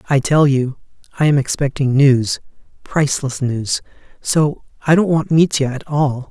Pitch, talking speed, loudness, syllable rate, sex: 140 Hz, 150 wpm, -17 LUFS, 4.5 syllables/s, male